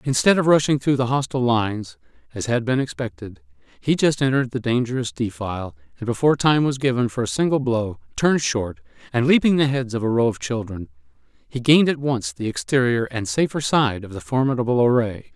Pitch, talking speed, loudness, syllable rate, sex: 120 Hz, 195 wpm, -21 LUFS, 5.8 syllables/s, male